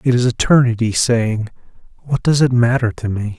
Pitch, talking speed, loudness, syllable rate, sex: 120 Hz, 175 wpm, -16 LUFS, 5.2 syllables/s, male